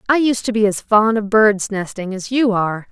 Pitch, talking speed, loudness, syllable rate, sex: 210 Hz, 225 wpm, -17 LUFS, 5.2 syllables/s, female